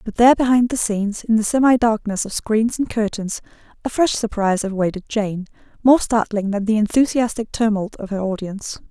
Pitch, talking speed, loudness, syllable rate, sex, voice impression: 215 Hz, 180 wpm, -19 LUFS, 5.5 syllables/s, female, feminine, adult-like, relaxed, slightly bright, soft, raspy, intellectual, calm, reassuring, elegant, kind, modest